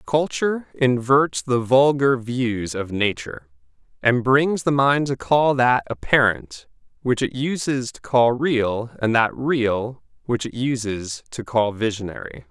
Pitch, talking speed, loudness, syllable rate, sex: 120 Hz, 145 wpm, -21 LUFS, 3.9 syllables/s, male